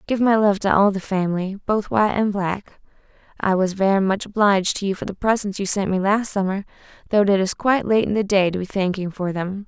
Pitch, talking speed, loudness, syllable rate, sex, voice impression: 200 Hz, 240 wpm, -20 LUFS, 5.9 syllables/s, female, feminine, adult-like, slightly relaxed, bright, soft, fluent, slightly raspy, intellectual, calm, friendly, reassuring, elegant, kind, modest